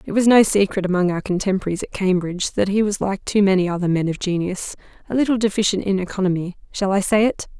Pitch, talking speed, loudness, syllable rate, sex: 195 Hz, 215 wpm, -20 LUFS, 6.5 syllables/s, female